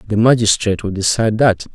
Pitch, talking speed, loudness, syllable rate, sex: 110 Hz, 170 wpm, -15 LUFS, 6.6 syllables/s, male